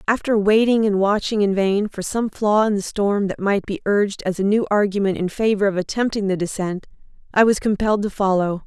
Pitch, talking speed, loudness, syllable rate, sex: 205 Hz, 215 wpm, -20 LUFS, 5.5 syllables/s, female